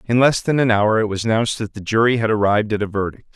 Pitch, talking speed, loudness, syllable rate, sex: 110 Hz, 285 wpm, -18 LUFS, 7.0 syllables/s, male